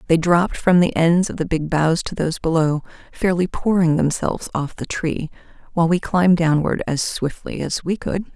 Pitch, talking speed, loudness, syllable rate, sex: 170 Hz, 195 wpm, -20 LUFS, 5.2 syllables/s, female